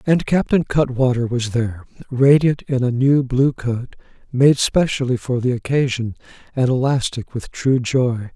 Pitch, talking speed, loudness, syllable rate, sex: 130 Hz, 150 wpm, -18 LUFS, 4.5 syllables/s, male